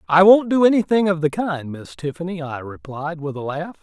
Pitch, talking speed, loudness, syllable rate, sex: 165 Hz, 220 wpm, -19 LUFS, 5.3 syllables/s, male